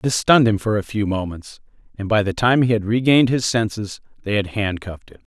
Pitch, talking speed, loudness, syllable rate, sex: 105 Hz, 225 wpm, -19 LUFS, 5.8 syllables/s, male